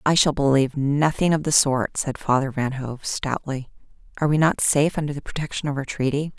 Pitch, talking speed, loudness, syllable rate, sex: 140 Hz, 205 wpm, -22 LUFS, 5.7 syllables/s, female